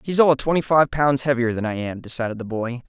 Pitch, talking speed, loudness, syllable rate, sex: 130 Hz, 270 wpm, -21 LUFS, 6.2 syllables/s, male